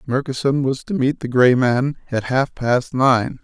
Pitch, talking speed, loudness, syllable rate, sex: 130 Hz, 190 wpm, -18 LUFS, 4.1 syllables/s, male